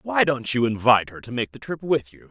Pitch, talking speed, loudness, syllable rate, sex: 125 Hz, 285 wpm, -22 LUFS, 5.9 syllables/s, male